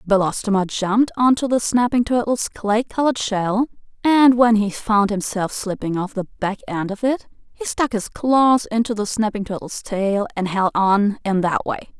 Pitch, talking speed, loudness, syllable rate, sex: 215 Hz, 180 wpm, -19 LUFS, 4.6 syllables/s, female